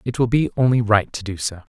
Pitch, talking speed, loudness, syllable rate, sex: 115 Hz, 275 wpm, -20 LUFS, 6.0 syllables/s, male